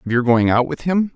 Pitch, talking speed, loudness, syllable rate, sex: 135 Hz, 310 wpm, -17 LUFS, 5.8 syllables/s, male